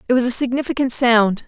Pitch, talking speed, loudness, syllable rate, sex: 250 Hz, 205 wpm, -16 LUFS, 6.3 syllables/s, female